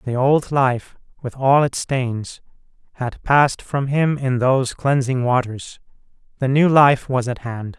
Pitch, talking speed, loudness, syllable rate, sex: 130 Hz, 160 wpm, -19 LUFS, 4.0 syllables/s, male